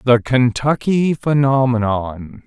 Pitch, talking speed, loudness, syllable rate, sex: 125 Hz, 75 wpm, -16 LUFS, 3.5 syllables/s, male